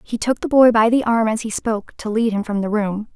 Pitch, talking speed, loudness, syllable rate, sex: 220 Hz, 305 wpm, -18 LUFS, 5.7 syllables/s, female